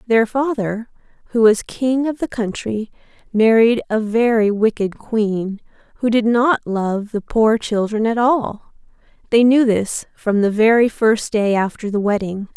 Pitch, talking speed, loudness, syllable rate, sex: 220 Hz, 160 wpm, -17 LUFS, 4.1 syllables/s, female